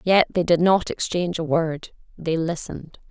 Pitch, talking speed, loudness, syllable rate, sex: 170 Hz, 175 wpm, -22 LUFS, 4.9 syllables/s, female